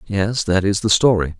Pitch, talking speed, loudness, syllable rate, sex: 100 Hz, 215 wpm, -17 LUFS, 4.8 syllables/s, male